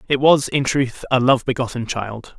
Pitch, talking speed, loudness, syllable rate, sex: 125 Hz, 200 wpm, -18 LUFS, 4.6 syllables/s, male